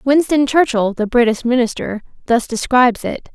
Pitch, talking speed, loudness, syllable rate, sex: 245 Hz, 145 wpm, -16 LUFS, 5.1 syllables/s, female